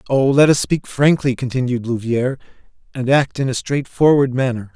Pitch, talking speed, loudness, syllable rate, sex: 130 Hz, 165 wpm, -17 LUFS, 5.2 syllables/s, male